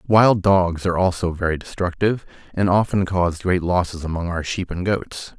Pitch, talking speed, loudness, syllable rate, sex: 90 Hz, 180 wpm, -20 LUFS, 5.1 syllables/s, male